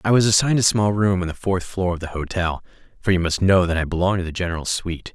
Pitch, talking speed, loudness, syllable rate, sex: 90 Hz, 280 wpm, -20 LUFS, 4.1 syllables/s, male